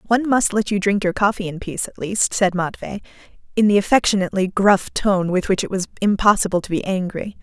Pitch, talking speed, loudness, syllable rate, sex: 195 Hz, 210 wpm, -19 LUFS, 6.0 syllables/s, female